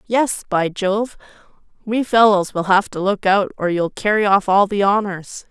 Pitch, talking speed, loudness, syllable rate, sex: 200 Hz, 185 wpm, -17 LUFS, 4.4 syllables/s, female